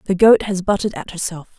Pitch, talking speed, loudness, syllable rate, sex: 190 Hz, 225 wpm, -18 LUFS, 5.7 syllables/s, female